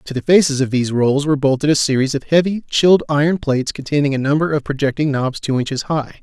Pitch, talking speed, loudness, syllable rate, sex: 145 Hz, 230 wpm, -17 LUFS, 6.5 syllables/s, male